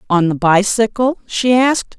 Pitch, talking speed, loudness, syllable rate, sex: 220 Hz, 150 wpm, -14 LUFS, 4.6 syllables/s, female